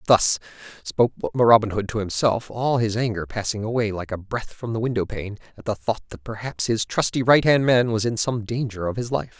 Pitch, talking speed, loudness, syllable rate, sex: 110 Hz, 210 wpm, -22 LUFS, 5.6 syllables/s, male